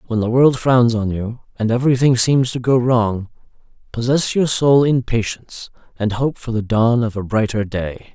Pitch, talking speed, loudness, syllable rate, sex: 120 Hz, 190 wpm, -17 LUFS, 4.7 syllables/s, male